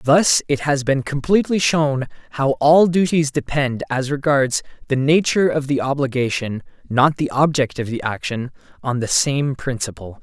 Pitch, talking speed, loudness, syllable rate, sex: 140 Hz, 160 wpm, -19 LUFS, 4.5 syllables/s, male